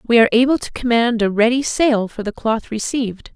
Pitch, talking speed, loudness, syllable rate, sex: 230 Hz, 215 wpm, -17 LUFS, 5.5 syllables/s, female